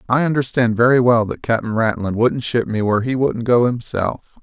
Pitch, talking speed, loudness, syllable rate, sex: 115 Hz, 205 wpm, -18 LUFS, 5.4 syllables/s, male